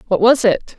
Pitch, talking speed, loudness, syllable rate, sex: 210 Hz, 230 wpm, -14 LUFS, 4.9 syllables/s, female